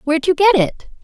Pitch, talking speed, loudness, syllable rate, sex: 310 Hz, 235 wpm, -15 LUFS, 6.3 syllables/s, female